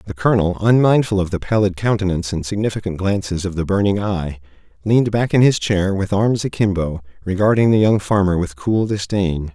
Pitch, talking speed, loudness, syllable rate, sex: 100 Hz, 180 wpm, -18 LUFS, 5.6 syllables/s, male